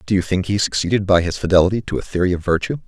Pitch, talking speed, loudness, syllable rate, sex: 95 Hz, 270 wpm, -18 LUFS, 7.3 syllables/s, male